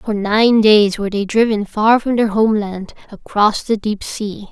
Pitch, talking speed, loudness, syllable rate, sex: 210 Hz, 185 wpm, -15 LUFS, 4.5 syllables/s, female